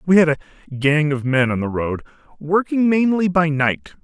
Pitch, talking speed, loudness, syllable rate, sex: 155 Hz, 195 wpm, -18 LUFS, 4.9 syllables/s, male